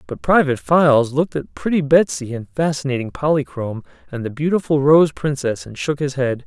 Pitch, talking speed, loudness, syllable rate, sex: 140 Hz, 175 wpm, -18 LUFS, 5.6 syllables/s, male